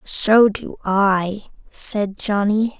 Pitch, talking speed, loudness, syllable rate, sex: 205 Hz, 110 wpm, -18 LUFS, 2.5 syllables/s, female